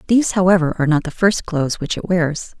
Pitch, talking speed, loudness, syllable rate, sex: 175 Hz, 230 wpm, -17 LUFS, 6.3 syllables/s, female